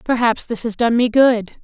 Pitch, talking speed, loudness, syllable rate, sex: 235 Hz, 220 wpm, -16 LUFS, 4.9 syllables/s, female